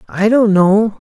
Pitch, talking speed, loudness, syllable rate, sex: 205 Hz, 165 wpm, -12 LUFS, 3.6 syllables/s, male